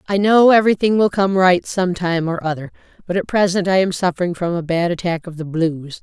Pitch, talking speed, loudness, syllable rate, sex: 180 Hz, 230 wpm, -17 LUFS, 5.6 syllables/s, female